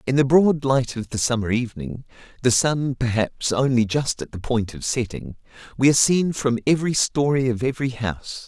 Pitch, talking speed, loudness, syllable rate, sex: 125 Hz, 190 wpm, -21 LUFS, 5.4 syllables/s, male